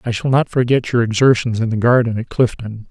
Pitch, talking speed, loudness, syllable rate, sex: 120 Hz, 225 wpm, -16 LUFS, 5.8 syllables/s, male